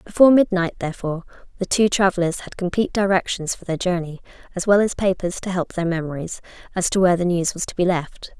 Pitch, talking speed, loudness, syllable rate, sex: 180 Hz, 205 wpm, -21 LUFS, 6.3 syllables/s, female